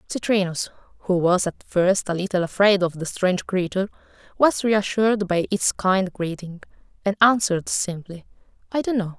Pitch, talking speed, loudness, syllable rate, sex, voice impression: 190 Hz, 155 wpm, -22 LUFS, 5.2 syllables/s, female, feminine, slightly adult-like, slightly soft, slightly calm, slightly sweet